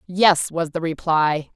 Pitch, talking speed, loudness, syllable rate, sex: 165 Hz, 155 wpm, -20 LUFS, 3.7 syllables/s, female